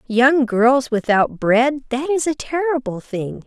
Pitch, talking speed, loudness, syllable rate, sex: 255 Hz, 140 wpm, -18 LUFS, 3.8 syllables/s, female